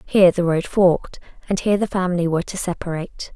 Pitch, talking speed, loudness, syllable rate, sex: 180 Hz, 195 wpm, -20 LUFS, 6.7 syllables/s, female